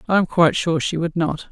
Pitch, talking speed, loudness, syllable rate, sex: 165 Hz, 275 wpm, -19 LUFS, 6.0 syllables/s, female